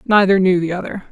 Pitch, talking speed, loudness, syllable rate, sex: 190 Hz, 215 wpm, -16 LUFS, 6.1 syllables/s, female